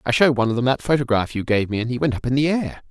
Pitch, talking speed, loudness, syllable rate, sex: 125 Hz, 350 wpm, -20 LUFS, 7.6 syllables/s, male